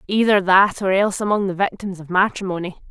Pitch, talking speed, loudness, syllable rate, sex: 190 Hz, 185 wpm, -18 LUFS, 6.0 syllables/s, female